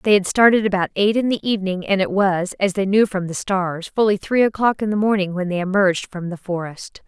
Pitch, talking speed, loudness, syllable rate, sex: 195 Hz, 245 wpm, -19 LUFS, 5.7 syllables/s, female